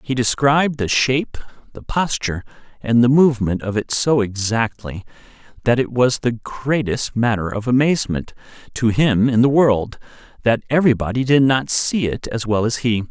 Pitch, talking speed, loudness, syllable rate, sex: 120 Hz, 165 wpm, -18 LUFS, 5.0 syllables/s, male